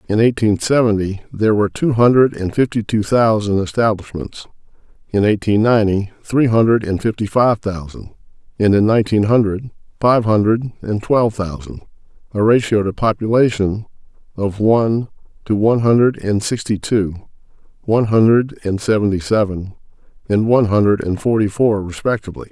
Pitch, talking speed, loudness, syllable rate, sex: 110 Hz, 145 wpm, -16 LUFS, 5.4 syllables/s, male